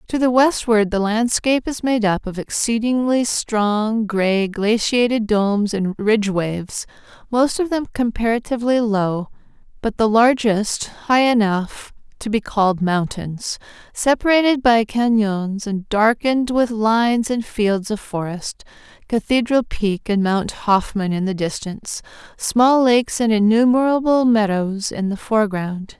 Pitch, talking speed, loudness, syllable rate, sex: 220 Hz, 135 wpm, -18 LUFS, 4.2 syllables/s, female